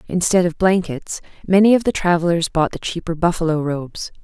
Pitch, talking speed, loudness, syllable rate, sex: 175 Hz, 170 wpm, -18 LUFS, 5.6 syllables/s, female